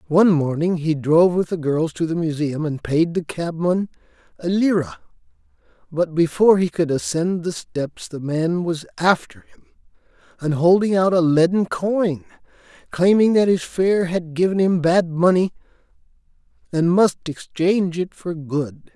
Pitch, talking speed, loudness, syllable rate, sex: 170 Hz, 155 wpm, -19 LUFS, 4.6 syllables/s, male